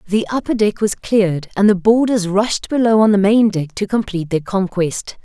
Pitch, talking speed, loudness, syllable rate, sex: 205 Hz, 205 wpm, -16 LUFS, 5.1 syllables/s, female